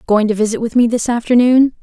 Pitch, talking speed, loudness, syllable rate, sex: 230 Hz, 230 wpm, -14 LUFS, 6.1 syllables/s, female